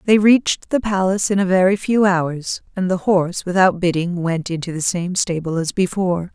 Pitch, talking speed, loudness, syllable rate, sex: 185 Hz, 200 wpm, -18 LUFS, 5.3 syllables/s, female